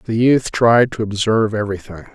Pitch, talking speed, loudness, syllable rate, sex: 110 Hz, 170 wpm, -16 LUFS, 5.8 syllables/s, male